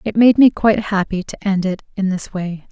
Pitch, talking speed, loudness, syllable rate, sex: 200 Hz, 245 wpm, -17 LUFS, 5.4 syllables/s, female